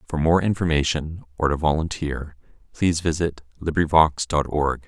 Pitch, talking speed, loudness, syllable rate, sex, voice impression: 80 Hz, 135 wpm, -22 LUFS, 5.0 syllables/s, male, very masculine, adult-like, very thick, very tensed, slightly relaxed, slightly weak, bright, soft, clear, fluent, slightly raspy, cool, very intellectual, refreshing, very sincere, very calm, very mature, friendly, reassuring, unique, elegant, slightly wild, sweet, lively, kind, slightly modest